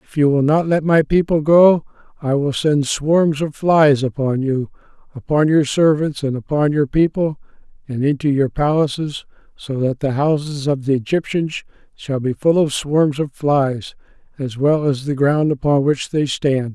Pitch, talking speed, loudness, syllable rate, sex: 145 Hz, 180 wpm, -17 LUFS, 4.4 syllables/s, male